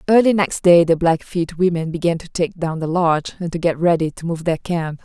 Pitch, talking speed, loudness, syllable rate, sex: 170 Hz, 240 wpm, -18 LUFS, 5.5 syllables/s, female